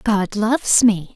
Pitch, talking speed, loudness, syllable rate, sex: 215 Hz, 155 wpm, -17 LUFS, 3.8 syllables/s, female